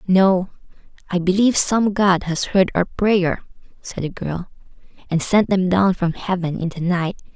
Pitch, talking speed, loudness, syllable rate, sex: 185 Hz, 170 wpm, -19 LUFS, 4.4 syllables/s, female